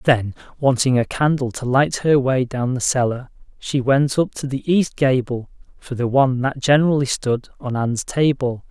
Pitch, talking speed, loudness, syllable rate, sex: 130 Hz, 185 wpm, -19 LUFS, 4.8 syllables/s, male